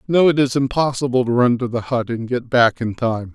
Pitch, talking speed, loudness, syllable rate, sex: 125 Hz, 250 wpm, -18 LUFS, 5.3 syllables/s, male